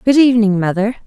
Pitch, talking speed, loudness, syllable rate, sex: 220 Hz, 170 wpm, -14 LUFS, 6.8 syllables/s, female